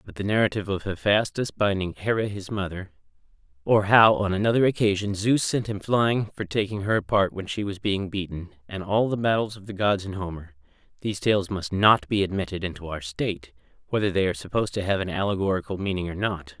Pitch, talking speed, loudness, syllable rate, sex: 100 Hz, 200 wpm, -24 LUFS, 5.9 syllables/s, male